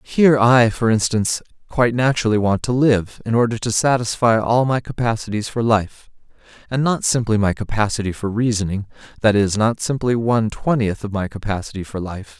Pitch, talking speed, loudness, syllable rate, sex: 110 Hz, 175 wpm, -19 LUFS, 5.5 syllables/s, male